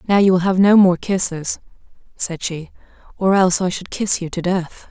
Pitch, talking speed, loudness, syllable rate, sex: 185 Hz, 210 wpm, -17 LUFS, 5.1 syllables/s, female